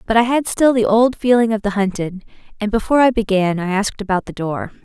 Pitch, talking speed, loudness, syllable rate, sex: 215 Hz, 235 wpm, -17 LUFS, 6.1 syllables/s, female